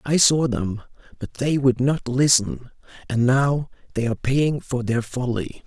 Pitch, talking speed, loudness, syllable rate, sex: 125 Hz, 170 wpm, -21 LUFS, 4.2 syllables/s, male